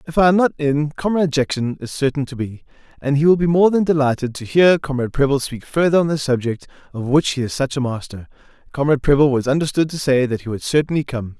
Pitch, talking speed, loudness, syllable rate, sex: 140 Hz, 235 wpm, -18 LUFS, 6.4 syllables/s, male